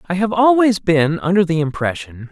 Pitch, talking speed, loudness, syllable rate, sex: 175 Hz, 180 wpm, -16 LUFS, 5.2 syllables/s, male